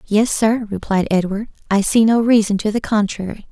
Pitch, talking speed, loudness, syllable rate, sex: 210 Hz, 190 wpm, -17 LUFS, 5.2 syllables/s, female